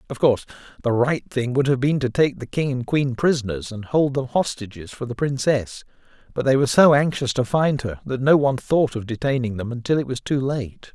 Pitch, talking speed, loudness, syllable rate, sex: 130 Hz, 230 wpm, -21 LUFS, 5.5 syllables/s, male